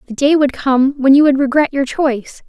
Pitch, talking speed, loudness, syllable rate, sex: 275 Hz, 240 wpm, -13 LUFS, 5.3 syllables/s, female